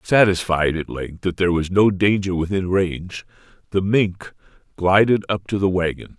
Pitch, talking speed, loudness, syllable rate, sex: 95 Hz, 165 wpm, -20 LUFS, 4.9 syllables/s, male